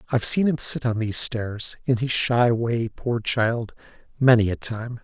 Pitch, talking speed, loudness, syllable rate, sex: 115 Hz, 190 wpm, -22 LUFS, 4.5 syllables/s, male